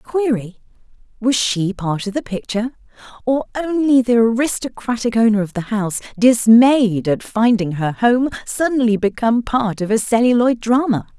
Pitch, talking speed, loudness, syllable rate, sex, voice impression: 230 Hz, 145 wpm, -17 LUFS, 4.9 syllables/s, female, feminine, middle-aged, tensed, powerful, bright, slightly soft, clear, slightly halting, intellectual, slightly friendly, elegant, lively, slightly strict, intense, sharp